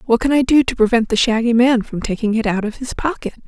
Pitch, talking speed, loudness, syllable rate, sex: 235 Hz, 275 wpm, -17 LUFS, 6.2 syllables/s, female